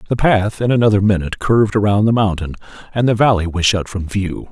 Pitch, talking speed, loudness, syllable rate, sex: 105 Hz, 215 wpm, -16 LUFS, 6.1 syllables/s, male